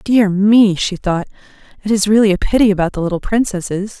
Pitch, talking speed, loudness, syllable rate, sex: 200 Hz, 195 wpm, -15 LUFS, 5.7 syllables/s, female